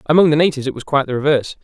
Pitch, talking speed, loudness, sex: 145 Hz, 295 wpm, -16 LUFS, male